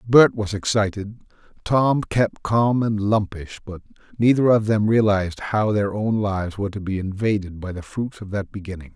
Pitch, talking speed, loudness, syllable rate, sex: 105 Hz, 180 wpm, -21 LUFS, 4.9 syllables/s, male